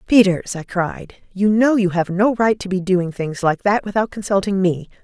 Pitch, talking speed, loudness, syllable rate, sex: 195 Hz, 215 wpm, -18 LUFS, 4.7 syllables/s, female